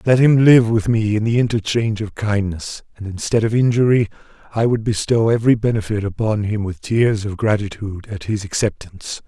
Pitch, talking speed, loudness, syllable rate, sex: 110 Hz, 180 wpm, -18 LUFS, 5.5 syllables/s, male